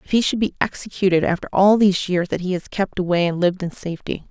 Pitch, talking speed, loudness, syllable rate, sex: 185 Hz, 250 wpm, -20 LUFS, 6.8 syllables/s, female